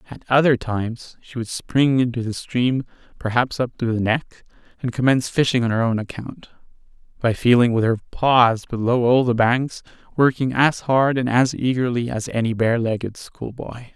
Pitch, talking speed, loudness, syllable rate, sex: 120 Hz, 180 wpm, -20 LUFS, 4.9 syllables/s, male